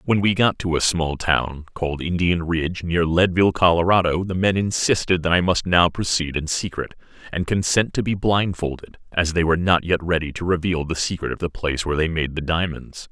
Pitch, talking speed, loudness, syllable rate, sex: 85 Hz, 210 wpm, -21 LUFS, 5.5 syllables/s, male